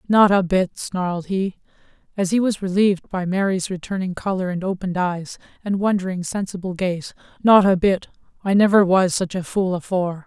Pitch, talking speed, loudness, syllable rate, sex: 190 Hz, 175 wpm, -20 LUFS, 5.3 syllables/s, female